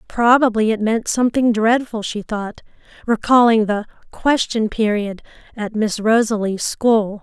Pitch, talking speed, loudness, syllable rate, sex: 220 Hz, 125 wpm, -17 LUFS, 4.4 syllables/s, female